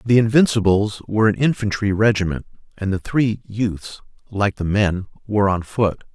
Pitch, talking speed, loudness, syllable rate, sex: 105 Hz, 155 wpm, -19 LUFS, 4.9 syllables/s, male